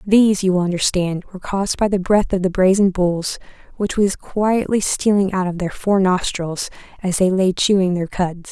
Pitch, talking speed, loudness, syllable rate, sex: 190 Hz, 195 wpm, -18 LUFS, 5.0 syllables/s, female